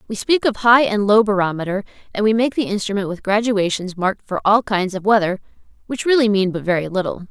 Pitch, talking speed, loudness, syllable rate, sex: 205 Hz, 215 wpm, -18 LUFS, 6.0 syllables/s, female